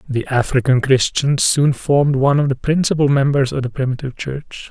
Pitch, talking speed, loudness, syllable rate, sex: 135 Hz, 180 wpm, -16 LUFS, 5.5 syllables/s, male